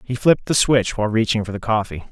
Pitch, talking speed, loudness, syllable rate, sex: 115 Hz, 255 wpm, -19 LUFS, 6.5 syllables/s, male